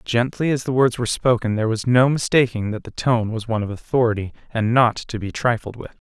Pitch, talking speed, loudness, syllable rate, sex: 115 Hz, 225 wpm, -20 LUFS, 6.0 syllables/s, male